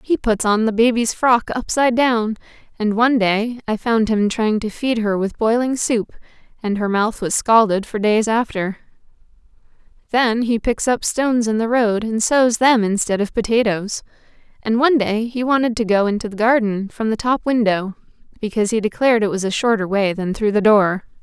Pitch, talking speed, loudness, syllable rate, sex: 220 Hz, 195 wpm, -18 LUFS, 5.1 syllables/s, female